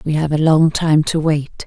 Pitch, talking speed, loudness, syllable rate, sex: 155 Hz, 250 wpm, -16 LUFS, 4.5 syllables/s, female